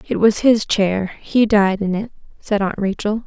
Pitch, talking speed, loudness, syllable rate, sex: 205 Hz, 200 wpm, -18 LUFS, 4.3 syllables/s, female